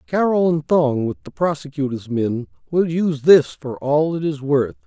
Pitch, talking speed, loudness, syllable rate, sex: 150 Hz, 185 wpm, -19 LUFS, 4.5 syllables/s, male